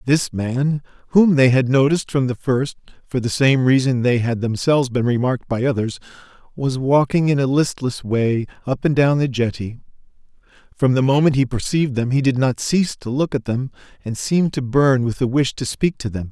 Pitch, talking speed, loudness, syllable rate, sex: 130 Hz, 205 wpm, -19 LUFS, 5.3 syllables/s, male